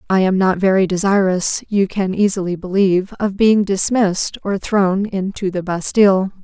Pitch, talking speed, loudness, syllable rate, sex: 190 Hz, 170 wpm, -17 LUFS, 4.8 syllables/s, female